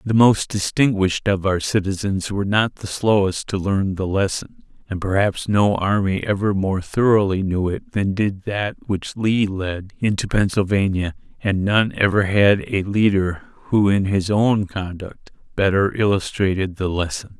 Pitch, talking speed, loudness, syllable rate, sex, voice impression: 100 Hz, 160 wpm, -20 LUFS, 4.4 syllables/s, male, very masculine, very adult-like, slightly thick, sincere, wild